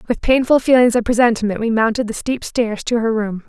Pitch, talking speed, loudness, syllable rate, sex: 230 Hz, 225 wpm, -16 LUFS, 5.8 syllables/s, female